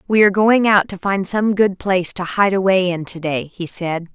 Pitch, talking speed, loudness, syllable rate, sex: 190 Hz, 245 wpm, -17 LUFS, 5.1 syllables/s, female